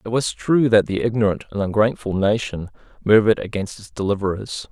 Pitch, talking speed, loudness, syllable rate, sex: 105 Hz, 165 wpm, -20 LUFS, 6.0 syllables/s, male